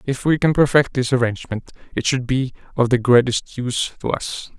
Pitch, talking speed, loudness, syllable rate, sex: 125 Hz, 195 wpm, -19 LUFS, 5.3 syllables/s, male